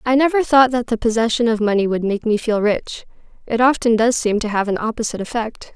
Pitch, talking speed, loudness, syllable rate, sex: 230 Hz, 230 wpm, -18 LUFS, 6.0 syllables/s, female